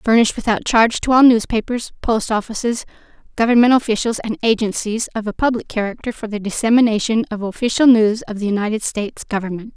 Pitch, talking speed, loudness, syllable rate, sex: 225 Hz, 165 wpm, -17 LUFS, 6.2 syllables/s, female